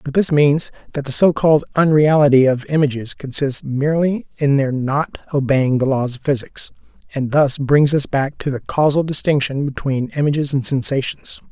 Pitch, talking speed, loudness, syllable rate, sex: 140 Hz, 165 wpm, -17 LUFS, 5.1 syllables/s, male